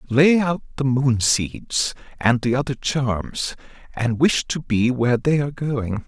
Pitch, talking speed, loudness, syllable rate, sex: 130 Hz, 170 wpm, -21 LUFS, 3.9 syllables/s, male